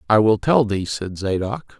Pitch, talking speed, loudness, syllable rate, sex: 110 Hz, 200 wpm, -20 LUFS, 4.4 syllables/s, male